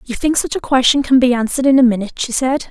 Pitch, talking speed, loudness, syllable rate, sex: 260 Hz, 290 wpm, -14 LUFS, 7.1 syllables/s, female